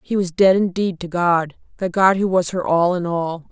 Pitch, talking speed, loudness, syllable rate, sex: 180 Hz, 220 wpm, -18 LUFS, 4.8 syllables/s, female